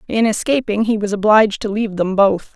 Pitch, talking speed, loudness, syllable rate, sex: 210 Hz, 210 wpm, -16 LUFS, 5.9 syllables/s, female